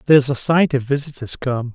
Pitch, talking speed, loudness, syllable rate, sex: 135 Hz, 205 wpm, -18 LUFS, 5.7 syllables/s, male